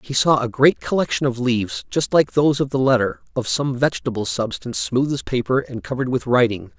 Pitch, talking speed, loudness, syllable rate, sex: 130 Hz, 210 wpm, -20 LUFS, 5.9 syllables/s, male